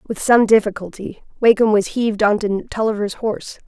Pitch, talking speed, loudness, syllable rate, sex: 210 Hz, 165 wpm, -17 LUFS, 5.4 syllables/s, female